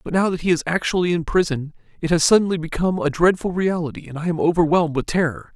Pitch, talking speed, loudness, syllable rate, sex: 165 Hz, 225 wpm, -20 LUFS, 6.8 syllables/s, male